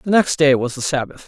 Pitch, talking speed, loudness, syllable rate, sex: 145 Hz, 285 wpm, -17 LUFS, 5.7 syllables/s, male